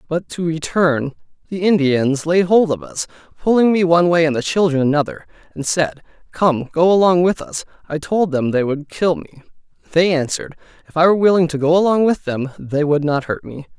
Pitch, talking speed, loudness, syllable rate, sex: 165 Hz, 205 wpm, -17 LUFS, 5.5 syllables/s, male